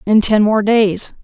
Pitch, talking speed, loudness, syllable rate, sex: 210 Hz, 195 wpm, -13 LUFS, 3.8 syllables/s, female